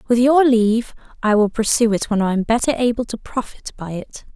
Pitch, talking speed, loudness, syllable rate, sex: 225 Hz, 220 wpm, -18 LUFS, 5.6 syllables/s, female